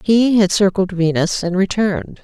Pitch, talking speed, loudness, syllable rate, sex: 195 Hz, 160 wpm, -16 LUFS, 4.7 syllables/s, female